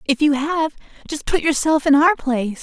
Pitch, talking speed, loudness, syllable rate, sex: 290 Hz, 205 wpm, -18 LUFS, 5.1 syllables/s, female